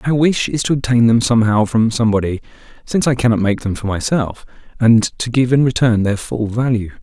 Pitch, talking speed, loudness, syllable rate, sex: 115 Hz, 205 wpm, -16 LUFS, 5.8 syllables/s, male